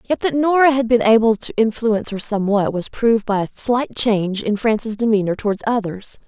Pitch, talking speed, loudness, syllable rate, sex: 220 Hz, 200 wpm, -18 LUFS, 5.7 syllables/s, female